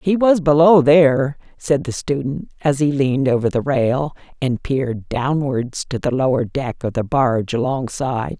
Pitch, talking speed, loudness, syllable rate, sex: 135 Hz, 170 wpm, -18 LUFS, 4.7 syllables/s, female